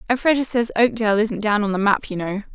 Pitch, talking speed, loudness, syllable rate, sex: 220 Hz, 235 wpm, -20 LUFS, 6.2 syllables/s, female